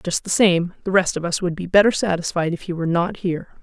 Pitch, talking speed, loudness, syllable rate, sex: 180 Hz, 265 wpm, -20 LUFS, 6.3 syllables/s, female